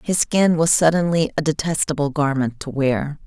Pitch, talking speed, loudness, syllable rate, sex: 155 Hz, 165 wpm, -19 LUFS, 4.9 syllables/s, female